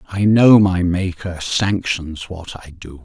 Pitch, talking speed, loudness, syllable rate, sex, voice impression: 90 Hz, 160 wpm, -16 LUFS, 3.5 syllables/s, male, very masculine, middle-aged, cool, calm, mature, elegant, slightly wild